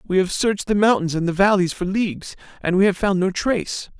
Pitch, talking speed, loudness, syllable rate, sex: 190 Hz, 240 wpm, -20 LUFS, 5.8 syllables/s, male